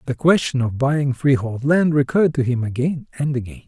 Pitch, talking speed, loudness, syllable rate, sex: 135 Hz, 195 wpm, -19 LUFS, 5.3 syllables/s, male